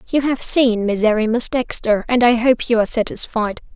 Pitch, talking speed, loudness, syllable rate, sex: 230 Hz, 175 wpm, -17 LUFS, 5.4 syllables/s, female